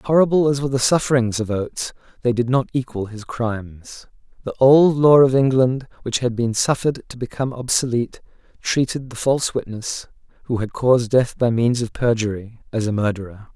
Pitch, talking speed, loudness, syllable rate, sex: 120 Hz, 175 wpm, -19 LUFS, 5.5 syllables/s, male